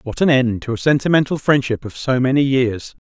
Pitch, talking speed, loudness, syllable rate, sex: 130 Hz, 215 wpm, -17 LUFS, 5.5 syllables/s, male